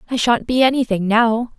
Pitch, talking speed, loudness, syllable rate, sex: 235 Hz, 190 wpm, -17 LUFS, 5.2 syllables/s, female